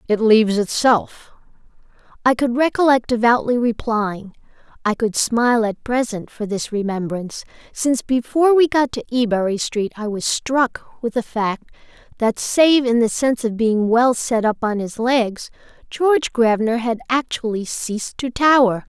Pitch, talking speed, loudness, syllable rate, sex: 235 Hz, 155 wpm, -18 LUFS, 4.7 syllables/s, female